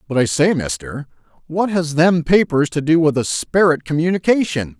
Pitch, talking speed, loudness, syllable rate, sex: 155 Hz, 175 wpm, -17 LUFS, 5.0 syllables/s, male